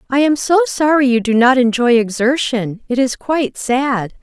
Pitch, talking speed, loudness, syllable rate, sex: 250 Hz, 170 wpm, -15 LUFS, 4.6 syllables/s, female